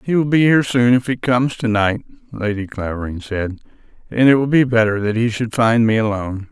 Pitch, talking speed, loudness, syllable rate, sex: 115 Hz, 220 wpm, -17 LUFS, 5.7 syllables/s, male